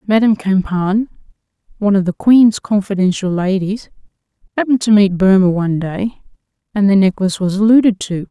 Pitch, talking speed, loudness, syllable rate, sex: 200 Hz, 145 wpm, -14 LUFS, 5.7 syllables/s, female